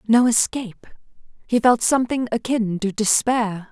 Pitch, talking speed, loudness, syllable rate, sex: 230 Hz, 130 wpm, -20 LUFS, 4.6 syllables/s, female